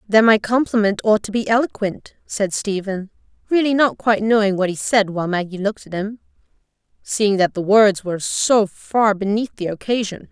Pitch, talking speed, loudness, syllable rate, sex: 205 Hz, 180 wpm, -18 LUFS, 5.3 syllables/s, female